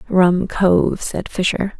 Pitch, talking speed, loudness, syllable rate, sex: 185 Hz, 135 wpm, -17 LUFS, 3.1 syllables/s, female